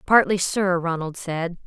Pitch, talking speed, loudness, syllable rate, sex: 180 Hz, 145 wpm, -22 LUFS, 4.1 syllables/s, female